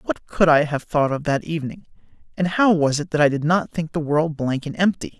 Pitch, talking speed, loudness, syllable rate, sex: 155 Hz, 255 wpm, -20 LUFS, 5.4 syllables/s, male